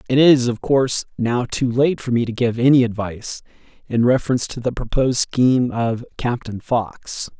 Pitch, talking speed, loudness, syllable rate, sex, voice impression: 120 Hz, 180 wpm, -19 LUFS, 5.1 syllables/s, male, very masculine, slightly middle-aged, slightly thick, slightly cool, sincere, slightly calm